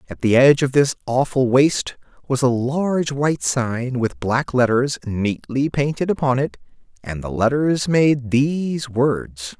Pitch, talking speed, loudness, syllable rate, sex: 130 Hz, 155 wpm, -19 LUFS, 4.3 syllables/s, male